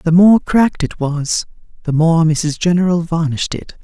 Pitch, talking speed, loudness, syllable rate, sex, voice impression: 165 Hz, 170 wpm, -15 LUFS, 4.7 syllables/s, female, feminine, very adult-like, slightly soft, calm, very elegant, sweet